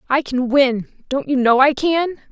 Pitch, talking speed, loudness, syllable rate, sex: 275 Hz, 180 wpm, -17 LUFS, 4.1 syllables/s, female